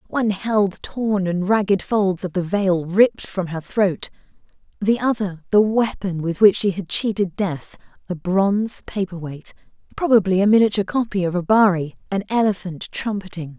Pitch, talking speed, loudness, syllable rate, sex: 195 Hz, 160 wpm, -20 LUFS, 4.8 syllables/s, female